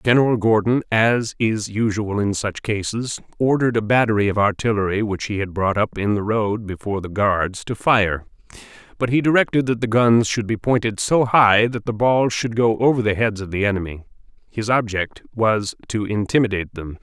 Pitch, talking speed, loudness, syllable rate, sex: 110 Hz, 190 wpm, -20 LUFS, 5.2 syllables/s, male